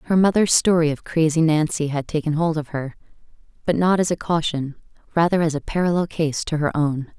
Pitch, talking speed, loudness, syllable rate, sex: 160 Hz, 200 wpm, -21 LUFS, 5.6 syllables/s, female